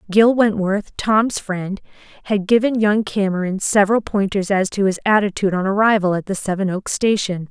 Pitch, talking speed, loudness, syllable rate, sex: 200 Hz, 170 wpm, -18 LUFS, 5.2 syllables/s, female